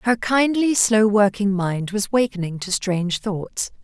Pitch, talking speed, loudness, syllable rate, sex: 205 Hz, 155 wpm, -20 LUFS, 4.2 syllables/s, female